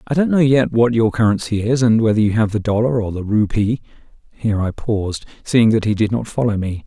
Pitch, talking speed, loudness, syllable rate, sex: 110 Hz, 225 wpm, -17 LUFS, 5.9 syllables/s, male